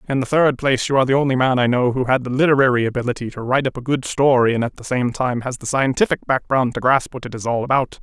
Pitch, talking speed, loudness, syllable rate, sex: 130 Hz, 285 wpm, -18 LUFS, 6.8 syllables/s, male